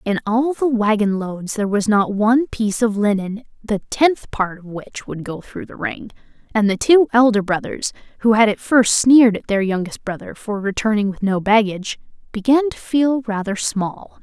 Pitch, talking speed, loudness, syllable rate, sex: 220 Hz, 195 wpm, -18 LUFS, 4.9 syllables/s, female